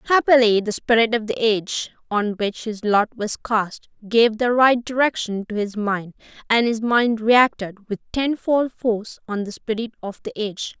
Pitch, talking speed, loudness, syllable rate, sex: 225 Hz, 180 wpm, -20 LUFS, 4.7 syllables/s, female